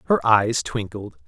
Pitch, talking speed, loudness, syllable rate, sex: 105 Hz, 140 wpm, -20 LUFS, 4.1 syllables/s, male